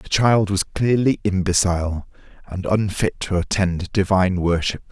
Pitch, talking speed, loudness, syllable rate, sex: 95 Hz, 135 wpm, -20 LUFS, 4.6 syllables/s, male